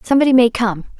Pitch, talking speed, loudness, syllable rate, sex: 235 Hz, 180 wpm, -15 LUFS, 7.6 syllables/s, female